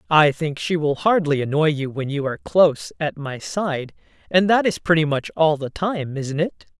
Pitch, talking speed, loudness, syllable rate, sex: 155 Hz, 210 wpm, -21 LUFS, 4.8 syllables/s, female